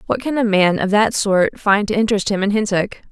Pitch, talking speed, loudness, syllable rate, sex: 205 Hz, 250 wpm, -17 LUFS, 5.6 syllables/s, female